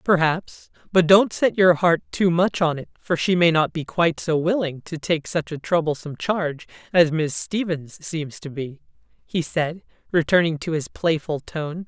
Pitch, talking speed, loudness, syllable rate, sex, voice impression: 165 Hz, 185 wpm, -22 LUFS, 4.6 syllables/s, female, very feminine, very middle-aged, slightly thin, tensed, powerful, slightly dark, soft, clear, fluent, slightly raspy, cool, intellectual, slightly refreshing, sincere, slightly calm, slightly friendly, reassuring, unique, elegant, wild, slightly sweet, lively, strict, intense